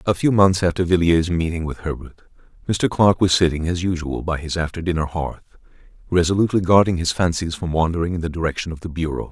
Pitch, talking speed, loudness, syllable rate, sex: 85 Hz, 200 wpm, -20 LUFS, 6.3 syllables/s, male